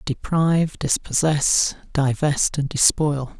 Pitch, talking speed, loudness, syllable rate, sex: 145 Hz, 90 wpm, -20 LUFS, 3.5 syllables/s, male